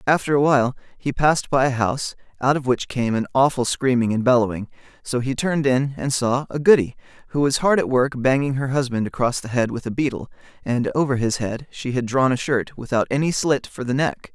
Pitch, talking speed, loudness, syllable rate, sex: 130 Hz, 225 wpm, -21 LUFS, 5.7 syllables/s, male